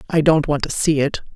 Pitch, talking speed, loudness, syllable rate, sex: 150 Hz, 265 wpm, -18 LUFS, 5.6 syllables/s, female